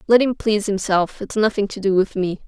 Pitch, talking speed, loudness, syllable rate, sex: 205 Hz, 245 wpm, -20 LUFS, 5.7 syllables/s, female